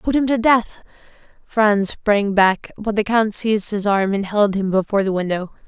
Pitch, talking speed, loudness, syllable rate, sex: 205 Hz, 200 wpm, -18 LUFS, 4.7 syllables/s, female